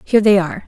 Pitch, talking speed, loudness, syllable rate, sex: 200 Hz, 265 wpm, -14 LUFS, 8.8 syllables/s, female